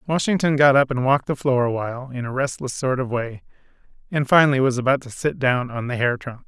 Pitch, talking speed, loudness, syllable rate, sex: 130 Hz, 240 wpm, -21 LUFS, 6.1 syllables/s, male